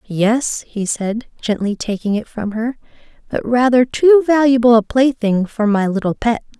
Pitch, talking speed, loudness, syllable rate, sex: 230 Hz, 165 wpm, -16 LUFS, 4.4 syllables/s, female